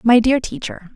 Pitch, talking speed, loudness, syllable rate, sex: 210 Hz, 190 wpm, -17 LUFS, 4.8 syllables/s, female